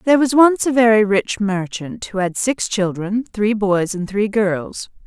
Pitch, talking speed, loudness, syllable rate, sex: 210 Hz, 190 wpm, -17 LUFS, 4.1 syllables/s, female